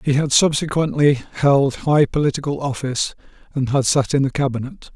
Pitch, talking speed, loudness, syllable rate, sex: 140 Hz, 155 wpm, -18 LUFS, 5.2 syllables/s, male